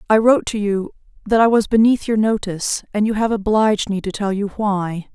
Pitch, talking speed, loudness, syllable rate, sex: 210 Hz, 220 wpm, -18 LUFS, 5.5 syllables/s, female